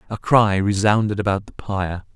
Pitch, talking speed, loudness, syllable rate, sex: 100 Hz, 165 wpm, -20 LUFS, 5.3 syllables/s, male